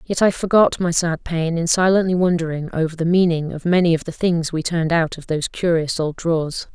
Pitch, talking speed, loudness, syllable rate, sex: 165 Hz, 220 wpm, -19 LUFS, 5.6 syllables/s, female